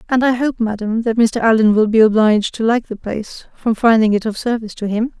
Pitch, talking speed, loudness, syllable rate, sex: 225 Hz, 240 wpm, -16 LUFS, 6.0 syllables/s, female